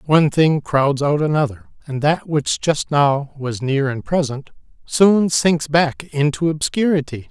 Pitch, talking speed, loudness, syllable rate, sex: 150 Hz, 155 wpm, -18 LUFS, 4.2 syllables/s, male